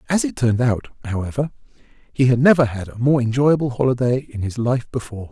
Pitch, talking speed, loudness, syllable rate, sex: 125 Hz, 190 wpm, -19 LUFS, 6.1 syllables/s, male